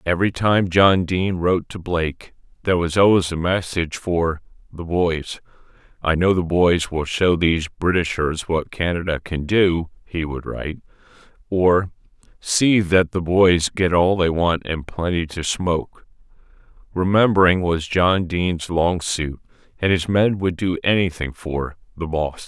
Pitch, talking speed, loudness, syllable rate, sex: 85 Hz, 155 wpm, -20 LUFS, 4.5 syllables/s, male